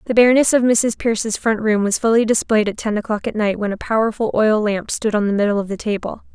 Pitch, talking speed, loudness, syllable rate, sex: 215 Hz, 255 wpm, -18 LUFS, 6.0 syllables/s, female